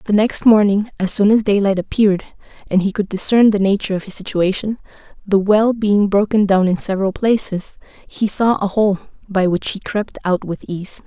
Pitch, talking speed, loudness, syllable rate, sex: 200 Hz, 195 wpm, -17 LUFS, 5.1 syllables/s, female